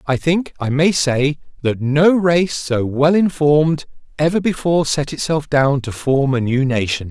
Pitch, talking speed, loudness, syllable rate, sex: 145 Hz, 175 wpm, -17 LUFS, 4.4 syllables/s, male